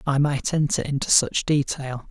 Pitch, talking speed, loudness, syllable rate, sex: 140 Hz, 170 wpm, -22 LUFS, 4.5 syllables/s, male